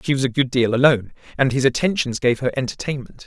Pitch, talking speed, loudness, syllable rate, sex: 130 Hz, 220 wpm, -20 LUFS, 6.5 syllables/s, male